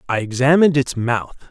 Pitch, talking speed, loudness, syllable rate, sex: 130 Hz, 160 wpm, -17 LUFS, 5.8 syllables/s, male